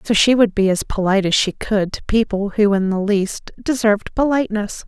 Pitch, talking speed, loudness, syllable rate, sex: 210 Hz, 210 wpm, -18 LUFS, 5.4 syllables/s, female